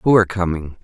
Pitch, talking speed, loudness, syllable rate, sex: 95 Hz, 215 wpm, -18 LUFS, 6.5 syllables/s, male